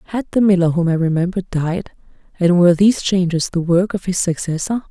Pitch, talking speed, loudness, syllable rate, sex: 180 Hz, 195 wpm, -17 LUFS, 6.1 syllables/s, female